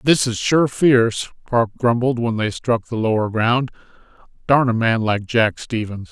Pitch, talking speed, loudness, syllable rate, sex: 120 Hz, 175 wpm, -18 LUFS, 4.3 syllables/s, male